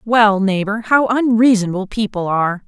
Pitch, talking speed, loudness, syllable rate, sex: 210 Hz, 135 wpm, -16 LUFS, 5.1 syllables/s, female